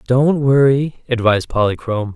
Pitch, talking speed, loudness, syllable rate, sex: 125 Hz, 110 wpm, -16 LUFS, 5.1 syllables/s, male